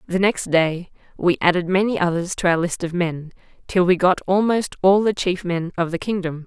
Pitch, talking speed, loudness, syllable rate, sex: 180 Hz, 215 wpm, -20 LUFS, 5.1 syllables/s, female